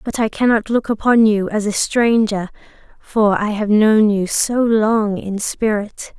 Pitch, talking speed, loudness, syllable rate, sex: 215 Hz, 165 wpm, -16 LUFS, 3.9 syllables/s, female